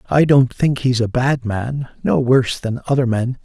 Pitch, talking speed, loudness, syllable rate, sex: 125 Hz, 190 wpm, -17 LUFS, 4.7 syllables/s, male